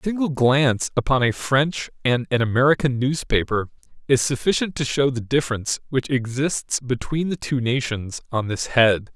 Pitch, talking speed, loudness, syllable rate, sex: 130 Hz, 165 wpm, -21 LUFS, 5.0 syllables/s, male